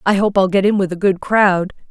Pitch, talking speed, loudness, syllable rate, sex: 195 Hz, 285 wpm, -15 LUFS, 5.4 syllables/s, female